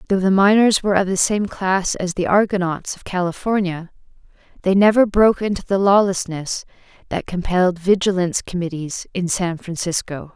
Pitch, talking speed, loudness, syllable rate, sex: 185 Hz, 150 wpm, -19 LUFS, 5.3 syllables/s, female